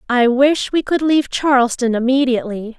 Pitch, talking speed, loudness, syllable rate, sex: 260 Hz, 150 wpm, -16 LUFS, 5.4 syllables/s, female